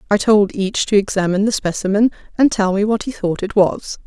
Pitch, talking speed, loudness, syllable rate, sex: 205 Hz, 220 wpm, -17 LUFS, 5.6 syllables/s, female